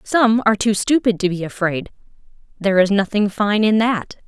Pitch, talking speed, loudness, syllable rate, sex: 210 Hz, 185 wpm, -18 LUFS, 5.4 syllables/s, female